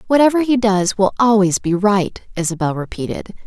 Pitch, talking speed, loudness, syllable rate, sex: 205 Hz, 155 wpm, -17 LUFS, 5.4 syllables/s, female